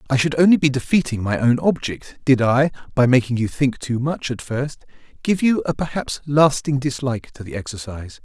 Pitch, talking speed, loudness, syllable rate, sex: 130 Hz, 195 wpm, -20 LUFS, 5.4 syllables/s, male